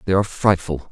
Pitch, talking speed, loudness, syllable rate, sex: 90 Hz, 195 wpm, -19 LUFS, 6.7 syllables/s, male